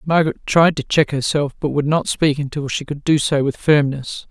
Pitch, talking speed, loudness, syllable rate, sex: 145 Hz, 225 wpm, -18 LUFS, 5.1 syllables/s, female